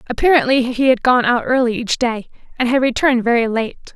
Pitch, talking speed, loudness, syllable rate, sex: 245 Hz, 195 wpm, -16 LUFS, 6.0 syllables/s, female